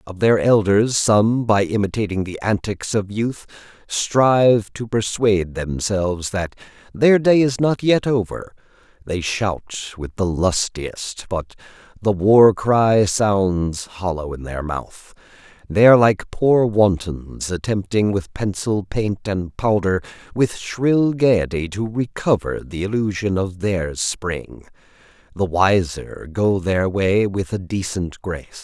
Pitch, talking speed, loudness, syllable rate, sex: 100 Hz, 135 wpm, -19 LUFS, 3.8 syllables/s, male